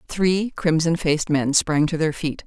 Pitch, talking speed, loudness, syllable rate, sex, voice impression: 160 Hz, 195 wpm, -21 LUFS, 4.4 syllables/s, female, feminine, adult-like, slightly fluent, slightly intellectual, slightly calm, slightly elegant